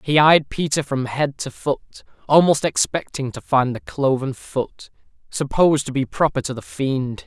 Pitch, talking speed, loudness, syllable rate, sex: 135 Hz, 175 wpm, -20 LUFS, 4.6 syllables/s, male